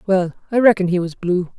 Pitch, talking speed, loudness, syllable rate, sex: 190 Hz, 225 wpm, -18 LUFS, 5.6 syllables/s, female